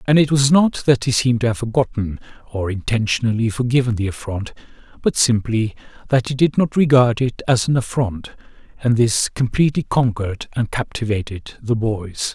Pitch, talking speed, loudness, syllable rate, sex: 120 Hz, 165 wpm, -19 LUFS, 5.3 syllables/s, male